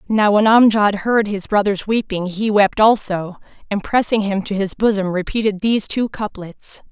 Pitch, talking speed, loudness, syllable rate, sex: 205 Hz, 175 wpm, -17 LUFS, 4.7 syllables/s, female